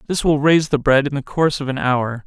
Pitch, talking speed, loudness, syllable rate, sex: 140 Hz, 290 wpm, -17 LUFS, 6.2 syllables/s, male